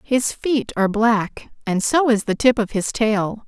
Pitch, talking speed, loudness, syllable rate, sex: 225 Hz, 205 wpm, -19 LUFS, 4.1 syllables/s, female